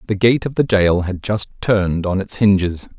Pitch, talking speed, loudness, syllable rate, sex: 100 Hz, 220 wpm, -17 LUFS, 5.0 syllables/s, male